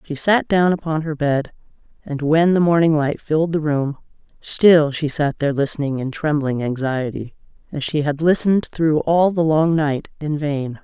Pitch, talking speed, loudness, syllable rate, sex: 155 Hz, 185 wpm, -19 LUFS, 4.7 syllables/s, female